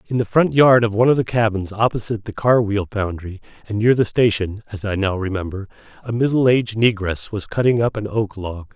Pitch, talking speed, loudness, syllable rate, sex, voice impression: 110 Hz, 220 wpm, -19 LUFS, 5.8 syllables/s, male, masculine, adult-like, slightly thick, cool, sincere, slightly calm